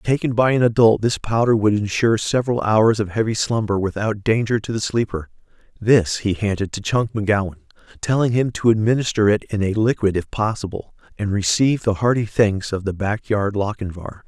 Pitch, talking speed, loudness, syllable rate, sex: 105 Hz, 180 wpm, -19 LUFS, 5.5 syllables/s, male